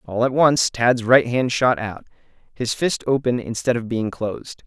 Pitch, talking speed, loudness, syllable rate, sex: 120 Hz, 195 wpm, -20 LUFS, 4.5 syllables/s, male